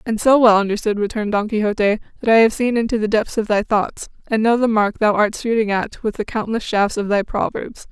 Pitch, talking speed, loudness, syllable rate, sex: 215 Hz, 245 wpm, -18 LUFS, 5.7 syllables/s, female